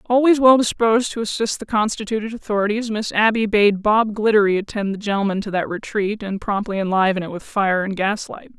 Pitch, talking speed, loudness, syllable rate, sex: 210 Hz, 190 wpm, -19 LUFS, 5.7 syllables/s, female